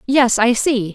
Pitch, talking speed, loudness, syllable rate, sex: 240 Hz, 190 wpm, -15 LUFS, 3.8 syllables/s, female